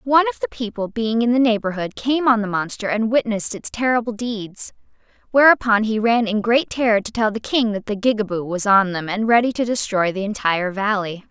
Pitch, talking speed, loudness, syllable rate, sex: 220 Hz, 210 wpm, -19 LUFS, 5.7 syllables/s, female